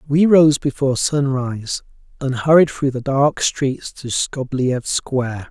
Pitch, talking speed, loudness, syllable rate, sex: 135 Hz, 140 wpm, -18 LUFS, 4.2 syllables/s, male